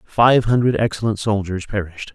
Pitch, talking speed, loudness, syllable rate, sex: 110 Hz, 140 wpm, -18 LUFS, 5.4 syllables/s, male